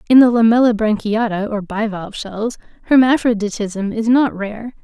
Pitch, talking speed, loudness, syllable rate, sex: 220 Hz, 125 wpm, -16 LUFS, 4.9 syllables/s, female